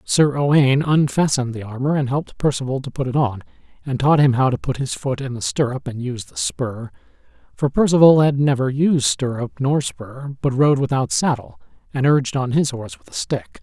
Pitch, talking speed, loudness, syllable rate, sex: 135 Hz, 205 wpm, -19 LUFS, 5.4 syllables/s, male